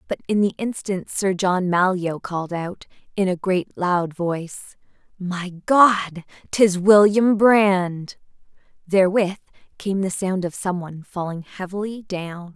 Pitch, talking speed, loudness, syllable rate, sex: 185 Hz, 140 wpm, -21 LUFS, 4.0 syllables/s, female